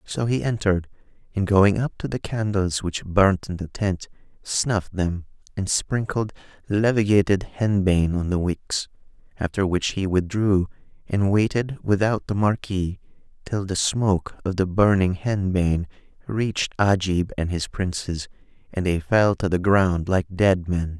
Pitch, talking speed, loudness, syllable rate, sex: 95 Hz, 150 wpm, -23 LUFS, 4.4 syllables/s, male